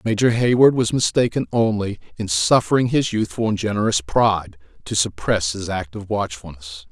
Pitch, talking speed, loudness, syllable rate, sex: 105 Hz, 145 wpm, -20 LUFS, 5.2 syllables/s, male